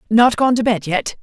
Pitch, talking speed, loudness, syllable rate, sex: 225 Hz, 245 wpm, -16 LUFS, 5.0 syllables/s, female